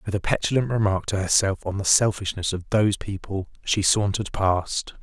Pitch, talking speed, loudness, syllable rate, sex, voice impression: 100 Hz, 180 wpm, -23 LUFS, 5.5 syllables/s, male, very masculine, very adult-like, old, very relaxed, very weak, dark, soft, very muffled, fluent, raspy, very cool, very intellectual, very sincere, very calm, very mature, very friendly, reassuring, very unique, elegant, slightly wild, very sweet, very kind, very modest